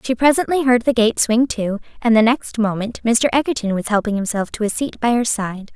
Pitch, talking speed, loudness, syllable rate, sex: 230 Hz, 230 wpm, -18 LUFS, 5.4 syllables/s, female